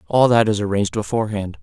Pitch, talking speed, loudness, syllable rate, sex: 110 Hz, 185 wpm, -19 LUFS, 6.8 syllables/s, male